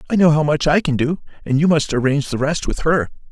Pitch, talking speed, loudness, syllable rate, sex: 150 Hz, 270 wpm, -18 LUFS, 6.3 syllables/s, male